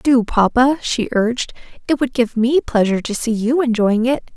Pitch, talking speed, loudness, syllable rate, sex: 240 Hz, 195 wpm, -17 LUFS, 4.9 syllables/s, female